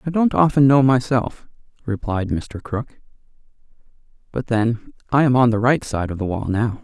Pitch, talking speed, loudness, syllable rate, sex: 120 Hz, 175 wpm, -19 LUFS, 4.8 syllables/s, male